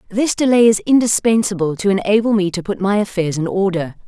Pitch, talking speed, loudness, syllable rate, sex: 200 Hz, 190 wpm, -16 LUFS, 5.8 syllables/s, female